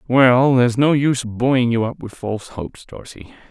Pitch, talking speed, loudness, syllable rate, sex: 125 Hz, 190 wpm, -17 LUFS, 5.0 syllables/s, male